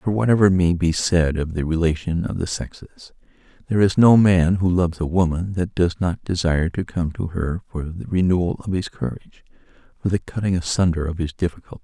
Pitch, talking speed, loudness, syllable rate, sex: 90 Hz, 205 wpm, -21 LUFS, 5.7 syllables/s, male